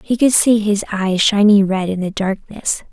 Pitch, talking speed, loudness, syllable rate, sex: 205 Hz, 205 wpm, -15 LUFS, 4.5 syllables/s, female